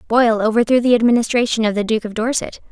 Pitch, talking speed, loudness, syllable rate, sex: 230 Hz, 200 wpm, -16 LUFS, 6.9 syllables/s, female